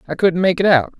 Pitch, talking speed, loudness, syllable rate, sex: 170 Hz, 300 wpm, -16 LUFS, 6.2 syllables/s, male